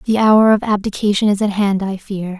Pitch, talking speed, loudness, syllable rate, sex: 205 Hz, 225 wpm, -15 LUFS, 5.3 syllables/s, female